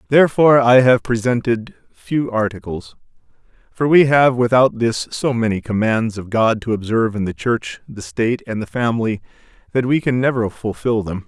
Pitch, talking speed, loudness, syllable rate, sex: 115 Hz, 170 wpm, -17 LUFS, 5.2 syllables/s, male